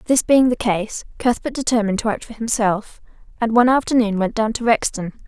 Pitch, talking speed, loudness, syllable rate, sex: 225 Hz, 195 wpm, -19 LUFS, 5.8 syllables/s, female